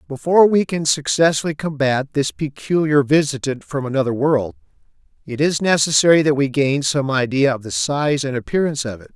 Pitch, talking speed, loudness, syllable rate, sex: 140 Hz, 170 wpm, -18 LUFS, 5.4 syllables/s, male